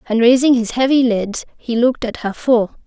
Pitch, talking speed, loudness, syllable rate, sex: 240 Hz, 210 wpm, -16 LUFS, 5.2 syllables/s, female